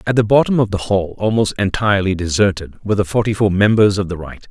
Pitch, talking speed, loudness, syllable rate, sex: 100 Hz, 225 wpm, -16 LUFS, 6.3 syllables/s, male